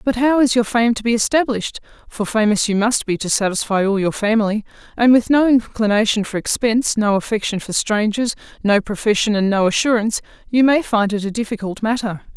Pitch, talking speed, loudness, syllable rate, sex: 220 Hz, 195 wpm, -17 LUFS, 5.8 syllables/s, female